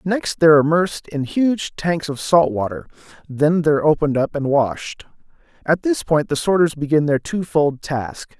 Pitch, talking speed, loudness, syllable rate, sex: 155 Hz, 170 wpm, -18 LUFS, 4.7 syllables/s, male